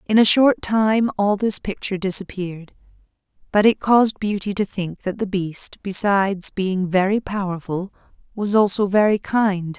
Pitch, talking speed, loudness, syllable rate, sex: 200 Hz, 155 wpm, -20 LUFS, 4.7 syllables/s, female